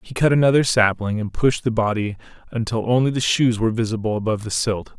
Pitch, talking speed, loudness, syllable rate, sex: 115 Hz, 205 wpm, -20 LUFS, 6.3 syllables/s, male